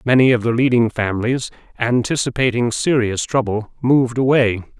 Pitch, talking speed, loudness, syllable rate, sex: 120 Hz, 125 wpm, -17 LUFS, 5.1 syllables/s, male